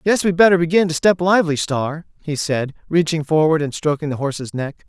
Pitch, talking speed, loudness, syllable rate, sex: 160 Hz, 210 wpm, -18 LUFS, 5.6 syllables/s, male